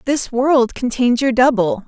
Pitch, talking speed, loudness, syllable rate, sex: 250 Hz, 160 wpm, -16 LUFS, 4.1 syllables/s, female